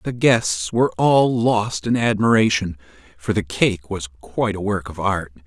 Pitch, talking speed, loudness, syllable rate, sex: 100 Hz, 175 wpm, -19 LUFS, 4.5 syllables/s, male